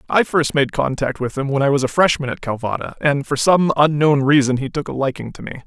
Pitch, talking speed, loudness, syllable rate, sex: 140 Hz, 255 wpm, -18 LUFS, 5.9 syllables/s, male